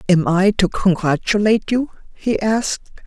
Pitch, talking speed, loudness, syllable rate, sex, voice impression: 200 Hz, 135 wpm, -18 LUFS, 4.7 syllables/s, female, very feminine, slightly middle-aged, thin, slightly powerful, slightly dark, slightly hard, slightly muffled, fluent, slightly raspy, slightly cute, intellectual, very refreshing, sincere, very calm, friendly, reassuring, unique, elegant, slightly wild, lively, kind